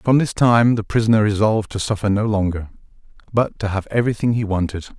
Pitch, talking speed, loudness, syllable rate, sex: 105 Hz, 195 wpm, -19 LUFS, 6.2 syllables/s, male